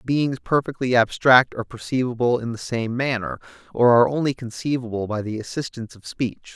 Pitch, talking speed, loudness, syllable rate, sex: 125 Hz, 165 wpm, -22 LUFS, 5.5 syllables/s, male